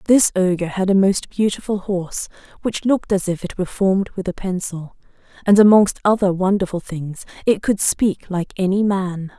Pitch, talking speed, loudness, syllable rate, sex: 190 Hz, 180 wpm, -19 LUFS, 5.1 syllables/s, female